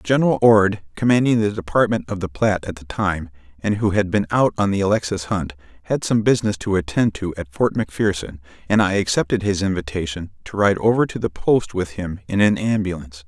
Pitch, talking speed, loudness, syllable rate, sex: 95 Hz, 205 wpm, -20 LUFS, 5.8 syllables/s, male